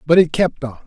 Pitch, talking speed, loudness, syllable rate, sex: 155 Hz, 275 wpm, -16 LUFS, 5.9 syllables/s, male